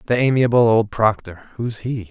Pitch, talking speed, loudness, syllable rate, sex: 110 Hz, 140 wpm, -18 LUFS, 5.0 syllables/s, male